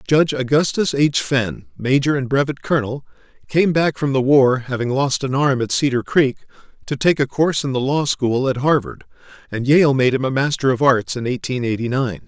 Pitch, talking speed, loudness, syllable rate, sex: 135 Hz, 205 wpm, -18 LUFS, 5.3 syllables/s, male